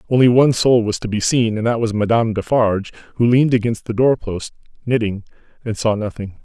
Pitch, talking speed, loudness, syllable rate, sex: 115 Hz, 195 wpm, -17 LUFS, 6.1 syllables/s, male